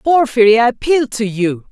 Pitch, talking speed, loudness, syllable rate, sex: 240 Hz, 175 wpm, -13 LUFS, 5.0 syllables/s, female